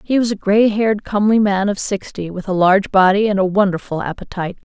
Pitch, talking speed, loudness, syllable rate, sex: 200 Hz, 215 wpm, -16 LUFS, 6.2 syllables/s, female